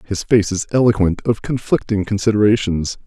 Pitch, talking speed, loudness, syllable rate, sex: 105 Hz, 135 wpm, -17 LUFS, 5.4 syllables/s, male